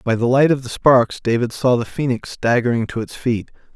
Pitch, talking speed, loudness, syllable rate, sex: 120 Hz, 225 wpm, -18 LUFS, 5.2 syllables/s, male